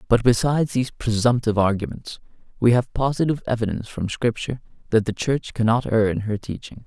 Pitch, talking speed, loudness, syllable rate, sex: 115 Hz, 165 wpm, -22 LUFS, 6.2 syllables/s, male